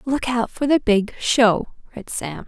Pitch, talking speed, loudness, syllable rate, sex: 235 Hz, 195 wpm, -20 LUFS, 3.7 syllables/s, female